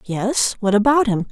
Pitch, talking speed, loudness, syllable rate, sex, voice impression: 225 Hz, 185 wpm, -17 LUFS, 4.4 syllables/s, female, very feminine, slightly young, adult-like, thin, tensed, powerful, very bright, soft, very clear, very fluent, slightly cute, cool, slightly intellectual, very refreshing, slightly sincere, slightly calm, friendly, reassuring, very unique, slightly elegant, wild, slightly sweet, very lively, strict, intense, very sharp, slightly light